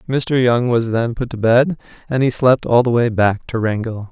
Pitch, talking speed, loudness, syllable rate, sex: 120 Hz, 235 wpm, -16 LUFS, 4.7 syllables/s, male